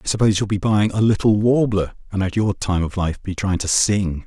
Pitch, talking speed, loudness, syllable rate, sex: 100 Hz, 255 wpm, -19 LUFS, 5.5 syllables/s, male